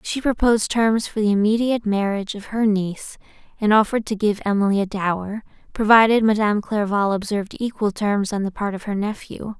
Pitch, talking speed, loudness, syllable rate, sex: 210 Hz, 180 wpm, -20 LUFS, 5.9 syllables/s, female